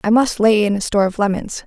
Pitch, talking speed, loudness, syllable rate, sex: 210 Hz, 290 wpm, -17 LUFS, 6.4 syllables/s, female